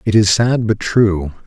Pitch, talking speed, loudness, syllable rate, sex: 105 Hz, 205 wpm, -15 LUFS, 4.1 syllables/s, male